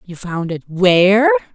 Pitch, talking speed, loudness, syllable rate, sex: 180 Hz, 115 wpm, -14 LUFS, 4.1 syllables/s, female